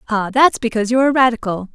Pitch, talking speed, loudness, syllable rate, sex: 235 Hz, 205 wpm, -16 LUFS, 7.4 syllables/s, female